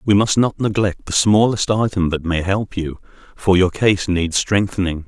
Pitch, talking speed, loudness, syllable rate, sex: 95 Hz, 190 wpm, -18 LUFS, 4.6 syllables/s, male